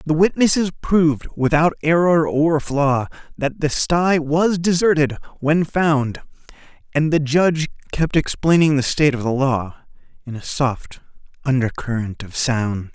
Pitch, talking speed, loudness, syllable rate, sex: 145 Hz, 145 wpm, -19 LUFS, 4.4 syllables/s, male